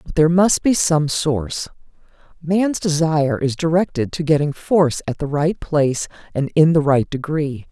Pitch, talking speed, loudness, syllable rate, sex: 155 Hz, 170 wpm, -18 LUFS, 4.9 syllables/s, female